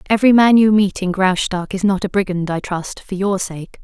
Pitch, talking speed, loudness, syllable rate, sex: 195 Hz, 235 wpm, -16 LUFS, 5.1 syllables/s, female